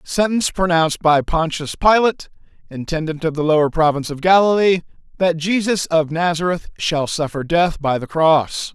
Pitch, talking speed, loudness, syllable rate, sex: 165 Hz, 150 wpm, -17 LUFS, 5.1 syllables/s, male